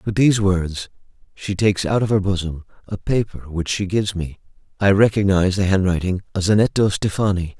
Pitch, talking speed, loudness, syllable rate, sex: 95 Hz, 175 wpm, -19 LUFS, 5.8 syllables/s, male